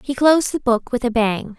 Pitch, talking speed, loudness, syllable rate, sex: 250 Hz, 265 wpm, -18 LUFS, 5.4 syllables/s, female